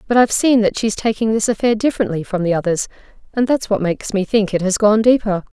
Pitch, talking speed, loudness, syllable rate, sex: 210 Hz, 240 wpm, -17 LUFS, 6.4 syllables/s, female